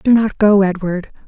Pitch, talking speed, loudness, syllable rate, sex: 200 Hz, 190 wpm, -15 LUFS, 4.5 syllables/s, female